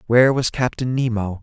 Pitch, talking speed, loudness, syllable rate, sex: 120 Hz, 170 wpm, -19 LUFS, 5.5 syllables/s, male